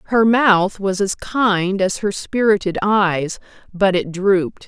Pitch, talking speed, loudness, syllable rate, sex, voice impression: 195 Hz, 155 wpm, -17 LUFS, 3.7 syllables/s, female, feminine, middle-aged, tensed, powerful, clear, fluent, intellectual, friendly, lively, slightly strict, slightly sharp